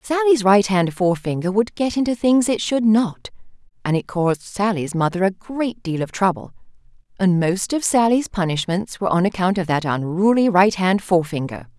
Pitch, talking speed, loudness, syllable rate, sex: 195 Hz, 165 wpm, -19 LUFS, 5.2 syllables/s, female